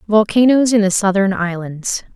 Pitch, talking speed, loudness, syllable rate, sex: 205 Hz, 140 wpm, -15 LUFS, 4.8 syllables/s, female